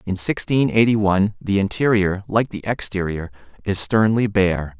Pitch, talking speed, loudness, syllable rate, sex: 100 Hz, 150 wpm, -19 LUFS, 4.7 syllables/s, male